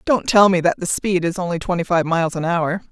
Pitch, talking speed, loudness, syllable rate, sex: 175 Hz, 270 wpm, -18 LUFS, 5.8 syllables/s, female